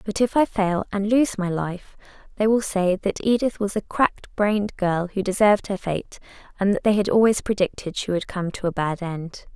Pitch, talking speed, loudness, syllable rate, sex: 200 Hz, 220 wpm, -22 LUFS, 5.2 syllables/s, female